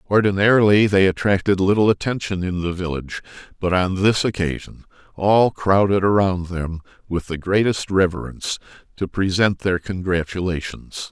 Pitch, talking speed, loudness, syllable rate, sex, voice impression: 95 Hz, 130 wpm, -20 LUFS, 5.0 syllables/s, male, very masculine, very adult-like, middle-aged, very thick, tensed, very powerful, slightly bright, soft, slightly muffled, fluent, very cool, intellectual, very sincere, very calm, very mature, very friendly, very reassuring, unique, very wild, sweet, slightly lively, kind